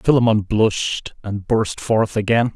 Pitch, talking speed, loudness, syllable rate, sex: 110 Hz, 140 wpm, -19 LUFS, 4.1 syllables/s, male